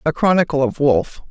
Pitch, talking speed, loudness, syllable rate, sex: 155 Hz, 185 wpm, -17 LUFS, 6.1 syllables/s, female